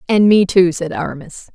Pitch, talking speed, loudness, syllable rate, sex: 180 Hz, 195 wpm, -14 LUFS, 5.3 syllables/s, female